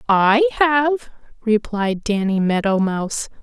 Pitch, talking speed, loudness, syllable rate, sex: 225 Hz, 105 wpm, -18 LUFS, 3.7 syllables/s, female